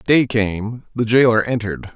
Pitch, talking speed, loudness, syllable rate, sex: 115 Hz, 155 wpm, -18 LUFS, 4.7 syllables/s, male